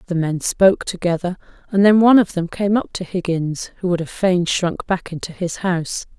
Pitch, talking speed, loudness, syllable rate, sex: 180 Hz, 215 wpm, -19 LUFS, 5.3 syllables/s, female